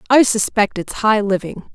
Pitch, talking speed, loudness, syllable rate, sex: 215 Hz, 170 wpm, -17 LUFS, 4.6 syllables/s, female